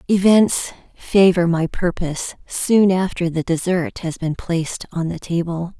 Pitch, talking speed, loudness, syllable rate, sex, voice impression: 175 Hz, 145 wpm, -19 LUFS, 4.2 syllables/s, female, feminine, adult-like, relaxed, slightly weak, slightly dark, intellectual, calm, slightly strict, sharp, slightly modest